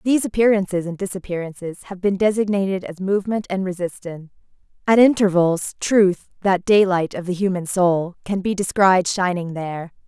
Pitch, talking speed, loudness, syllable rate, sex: 185 Hz, 150 wpm, -20 LUFS, 5.4 syllables/s, female